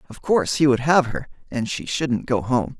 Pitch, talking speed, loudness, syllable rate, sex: 130 Hz, 235 wpm, -21 LUFS, 5.0 syllables/s, male